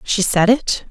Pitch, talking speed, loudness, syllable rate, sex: 205 Hz, 200 wpm, -16 LUFS, 3.8 syllables/s, female